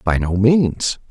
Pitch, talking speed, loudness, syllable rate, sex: 110 Hz, 160 wpm, -17 LUFS, 3.3 syllables/s, male